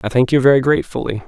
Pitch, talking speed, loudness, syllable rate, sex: 130 Hz, 235 wpm, -15 LUFS, 7.7 syllables/s, male